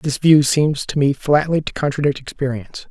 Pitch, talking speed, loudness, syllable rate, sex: 140 Hz, 185 wpm, -17 LUFS, 5.2 syllables/s, male